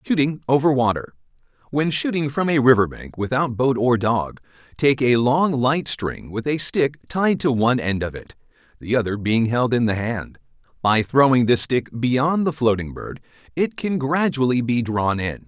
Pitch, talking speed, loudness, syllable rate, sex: 130 Hz, 180 wpm, -20 LUFS, 4.6 syllables/s, male